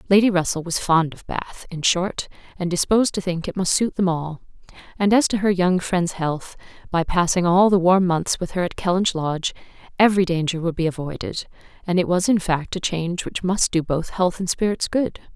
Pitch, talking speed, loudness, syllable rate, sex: 180 Hz, 215 wpm, -21 LUFS, 5.3 syllables/s, female